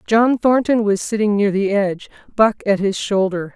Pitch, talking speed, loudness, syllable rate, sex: 205 Hz, 185 wpm, -17 LUFS, 4.8 syllables/s, female